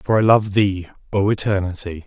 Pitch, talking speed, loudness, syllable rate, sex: 100 Hz, 175 wpm, -19 LUFS, 5.2 syllables/s, male